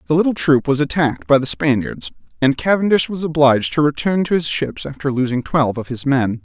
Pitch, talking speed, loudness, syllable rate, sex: 145 Hz, 215 wpm, -17 LUFS, 5.9 syllables/s, male